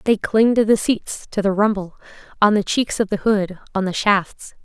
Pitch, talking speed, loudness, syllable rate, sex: 205 Hz, 220 wpm, -19 LUFS, 4.7 syllables/s, female